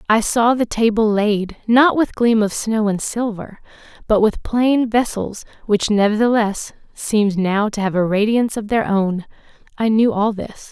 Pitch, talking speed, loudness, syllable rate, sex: 215 Hz, 175 wpm, -17 LUFS, 4.4 syllables/s, female